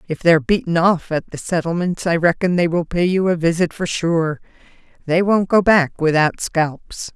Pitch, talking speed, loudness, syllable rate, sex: 170 Hz, 200 wpm, -18 LUFS, 4.9 syllables/s, female